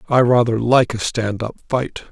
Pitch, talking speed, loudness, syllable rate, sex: 115 Hz, 170 wpm, -18 LUFS, 4.6 syllables/s, male